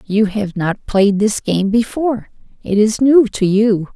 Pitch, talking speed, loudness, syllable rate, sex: 215 Hz, 165 wpm, -15 LUFS, 4.0 syllables/s, female